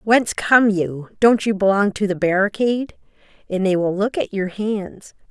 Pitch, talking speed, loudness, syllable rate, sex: 205 Hz, 180 wpm, -19 LUFS, 4.7 syllables/s, female